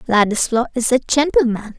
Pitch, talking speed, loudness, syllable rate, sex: 240 Hz, 135 wpm, -17 LUFS, 5.7 syllables/s, female